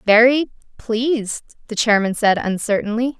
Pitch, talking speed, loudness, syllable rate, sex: 225 Hz, 115 wpm, -18 LUFS, 4.9 syllables/s, female